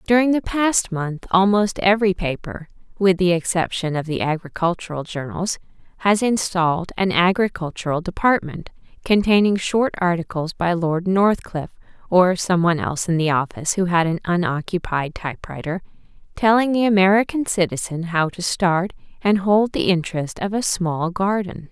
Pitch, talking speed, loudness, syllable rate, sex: 185 Hz, 145 wpm, -20 LUFS, 5.1 syllables/s, female